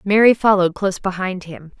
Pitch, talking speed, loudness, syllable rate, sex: 190 Hz, 165 wpm, -17 LUFS, 6.0 syllables/s, female